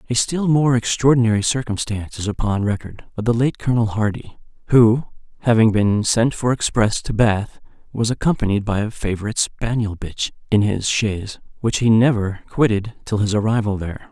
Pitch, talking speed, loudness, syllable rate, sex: 110 Hz, 165 wpm, -19 LUFS, 5.4 syllables/s, male